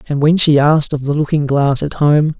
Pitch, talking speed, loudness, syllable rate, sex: 145 Hz, 250 wpm, -14 LUFS, 5.3 syllables/s, male